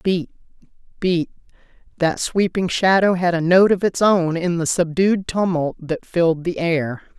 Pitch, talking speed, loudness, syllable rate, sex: 175 Hz, 160 wpm, -19 LUFS, 4.3 syllables/s, female